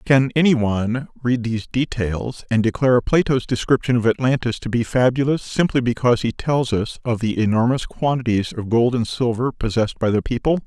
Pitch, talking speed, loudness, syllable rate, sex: 120 Hz, 180 wpm, -20 LUFS, 5.5 syllables/s, male